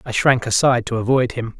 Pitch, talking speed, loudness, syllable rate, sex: 120 Hz, 225 wpm, -18 LUFS, 6.0 syllables/s, male